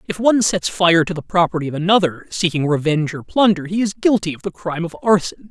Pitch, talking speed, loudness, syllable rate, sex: 175 Hz, 230 wpm, -18 LUFS, 6.2 syllables/s, male